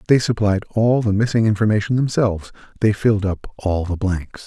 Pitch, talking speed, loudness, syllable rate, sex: 105 Hz, 175 wpm, -19 LUFS, 5.5 syllables/s, male